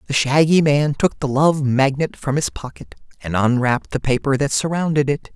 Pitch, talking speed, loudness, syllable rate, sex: 140 Hz, 190 wpm, -18 LUFS, 5.1 syllables/s, male